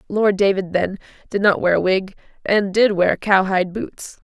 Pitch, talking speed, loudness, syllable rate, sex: 195 Hz, 180 wpm, -18 LUFS, 4.7 syllables/s, female